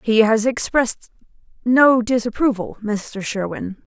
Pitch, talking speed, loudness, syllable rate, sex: 230 Hz, 105 wpm, -19 LUFS, 4.3 syllables/s, female